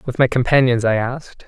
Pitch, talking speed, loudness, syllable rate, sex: 125 Hz, 205 wpm, -17 LUFS, 5.9 syllables/s, male